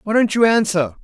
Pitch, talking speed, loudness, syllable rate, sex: 215 Hz, 230 wpm, -16 LUFS, 6.0 syllables/s, female